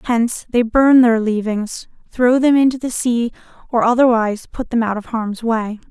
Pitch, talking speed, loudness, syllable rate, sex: 235 Hz, 185 wpm, -16 LUFS, 4.8 syllables/s, female